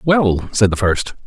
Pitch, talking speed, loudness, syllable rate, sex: 115 Hz, 190 wpm, -17 LUFS, 3.6 syllables/s, male